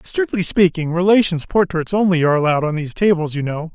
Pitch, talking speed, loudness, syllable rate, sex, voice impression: 175 Hz, 190 wpm, -17 LUFS, 6.3 syllables/s, male, masculine, middle-aged, slightly relaxed, powerful, slightly soft, muffled, slightly raspy, intellectual, slightly calm, mature, wild, slightly lively, slightly modest